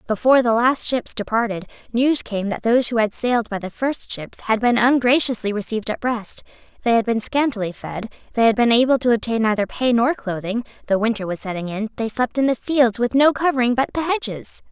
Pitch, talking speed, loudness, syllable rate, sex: 235 Hz, 215 wpm, -20 LUFS, 5.7 syllables/s, female